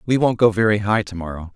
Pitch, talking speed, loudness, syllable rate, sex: 105 Hz, 270 wpm, -19 LUFS, 6.3 syllables/s, male